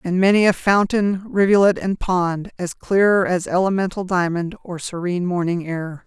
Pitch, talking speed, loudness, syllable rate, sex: 185 Hz, 160 wpm, -19 LUFS, 4.7 syllables/s, female